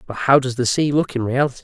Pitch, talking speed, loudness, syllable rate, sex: 130 Hz, 295 wpm, -18 LUFS, 6.9 syllables/s, male